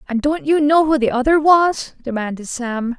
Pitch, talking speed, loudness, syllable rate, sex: 270 Hz, 200 wpm, -17 LUFS, 4.7 syllables/s, female